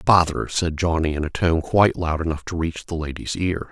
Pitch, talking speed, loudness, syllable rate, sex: 85 Hz, 225 wpm, -22 LUFS, 5.4 syllables/s, male